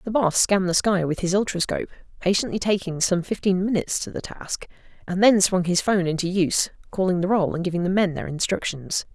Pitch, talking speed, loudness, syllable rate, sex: 185 Hz, 210 wpm, -23 LUFS, 6.1 syllables/s, female